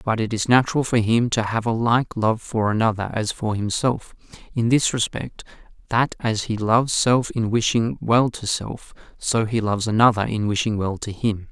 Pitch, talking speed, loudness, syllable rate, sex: 115 Hz, 200 wpm, -21 LUFS, 4.9 syllables/s, male